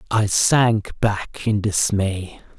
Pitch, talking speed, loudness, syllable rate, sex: 105 Hz, 115 wpm, -19 LUFS, 2.7 syllables/s, male